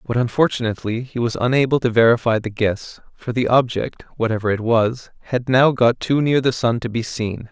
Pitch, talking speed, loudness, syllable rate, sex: 120 Hz, 200 wpm, -19 LUFS, 5.3 syllables/s, male